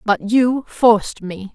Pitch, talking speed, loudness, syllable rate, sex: 220 Hz, 155 wpm, -16 LUFS, 3.5 syllables/s, female